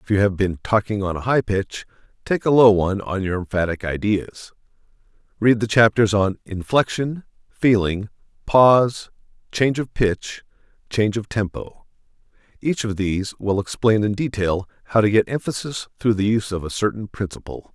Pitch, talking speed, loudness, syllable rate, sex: 105 Hz, 160 wpm, -20 LUFS, 5.1 syllables/s, male